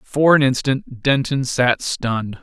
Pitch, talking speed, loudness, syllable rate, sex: 130 Hz, 150 wpm, -18 LUFS, 3.9 syllables/s, male